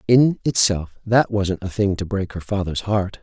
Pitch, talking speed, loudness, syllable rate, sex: 100 Hz, 205 wpm, -20 LUFS, 4.4 syllables/s, male